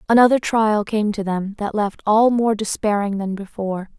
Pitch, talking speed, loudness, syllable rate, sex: 210 Hz, 180 wpm, -19 LUFS, 4.8 syllables/s, female